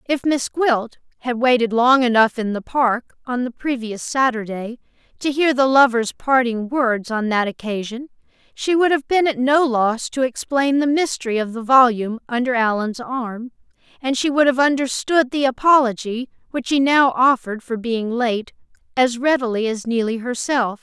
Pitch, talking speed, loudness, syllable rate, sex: 250 Hz, 170 wpm, -19 LUFS, 4.7 syllables/s, female